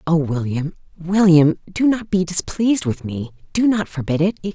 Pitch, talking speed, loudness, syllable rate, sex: 175 Hz, 170 wpm, -19 LUFS, 4.6 syllables/s, female